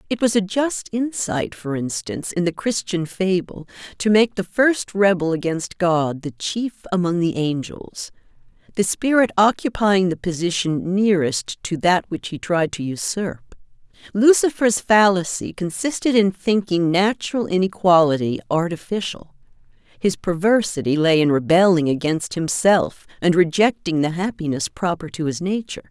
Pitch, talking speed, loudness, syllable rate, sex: 185 Hz, 135 wpm, -20 LUFS, 4.6 syllables/s, female